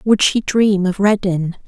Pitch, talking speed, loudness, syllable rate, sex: 195 Hz, 180 wpm, -16 LUFS, 4.0 syllables/s, female